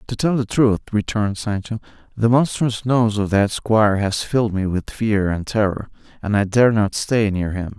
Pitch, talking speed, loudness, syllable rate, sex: 105 Hz, 200 wpm, -19 LUFS, 4.8 syllables/s, male